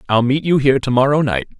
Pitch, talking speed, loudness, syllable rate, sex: 130 Hz, 265 wpm, -16 LUFS, 6.8 syllables/s, male